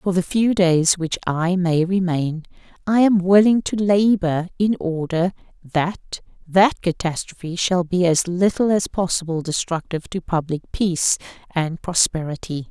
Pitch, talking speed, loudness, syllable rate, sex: 180 Hz, 140 wpm, -20 LUFS, 4.3 syllables/s, female